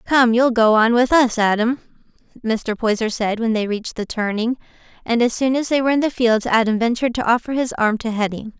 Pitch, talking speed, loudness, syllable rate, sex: 235 Hz, 225 wpm, -18 LUFS, 5.9 syllables/s, female